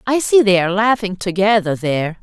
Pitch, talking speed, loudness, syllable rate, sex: 200 Hz, 190 wpm, -16 LUFS, 5.8 syllables/s, female